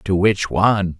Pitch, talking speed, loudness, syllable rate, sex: 95 Hz, 180 wpm, -17 LUFS, 4.2 syllables/s, male